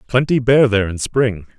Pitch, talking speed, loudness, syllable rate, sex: 115 Hz, 190 wpm, -16 LUFS, 5.2 syllables/s, male